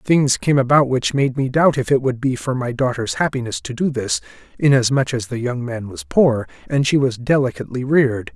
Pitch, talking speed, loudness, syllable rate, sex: 130 Hz, 215 wpm, -18 LUFS, 5.3 syllables/s, male